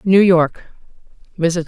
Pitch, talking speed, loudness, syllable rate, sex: 175 Hz, 105 wpm, -15 LUFS, 3.4 syllables/s, female